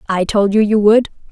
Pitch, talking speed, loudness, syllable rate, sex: 210 Hz, 230 wpm, -13 LUFS, 5.2 syllables/s, female